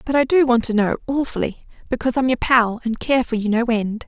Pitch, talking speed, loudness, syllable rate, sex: 240 Hz, 250 wpm, -19 LUFS, 5.9 syllables/s, female